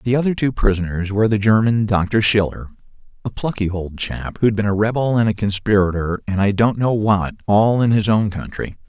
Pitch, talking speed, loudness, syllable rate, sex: 105 Hz, 195 wpm, -18 LUFS, 5.3 syllables/s, male